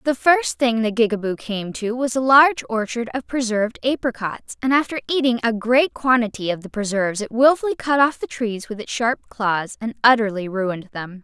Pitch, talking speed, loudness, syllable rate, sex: 235 Hz, 200 wpm, -20 LUFS, 5.3 syllables/s, female